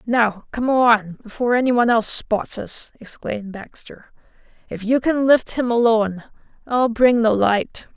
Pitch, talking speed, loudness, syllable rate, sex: 230 Hz, 150 wpm, -19 LUFS, 4.6 syllables/s, female